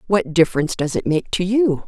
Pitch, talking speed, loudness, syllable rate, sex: 180 Hz, 225 wpm, -19 LUFS, 5.9 syllables/s, female